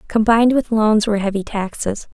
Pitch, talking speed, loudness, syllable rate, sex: 215 Hz, 165 wpm, -17 LUFS, 5.6 syllables/s, female